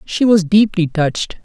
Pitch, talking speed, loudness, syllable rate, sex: 185 Hz, 165 wpm, -14 LUFS, 4.7 syllables/s, male